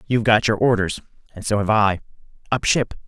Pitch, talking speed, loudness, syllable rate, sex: 110 Hz, 195 wpm, -19 LUFS, 5.9 syllables/s, male